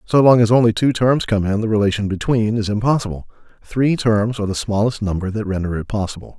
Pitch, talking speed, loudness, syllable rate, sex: 110 Hz, 215 wpm, -18 LUFS, 6.2 syllables/s, male